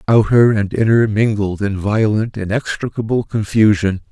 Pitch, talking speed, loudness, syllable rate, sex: 105 Hz, 115 wpm, -16 LUFS, 4.7 syllables/s, male